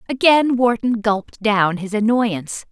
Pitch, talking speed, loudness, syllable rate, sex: 220 Hz, 135 wpm, -18 LUFS, 4.4 syllables/s, female